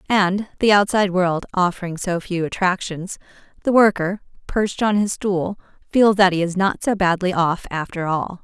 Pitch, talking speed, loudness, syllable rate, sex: 190 Hz, 170 wpm, -19 LUFS, 4.8 syllables/s, female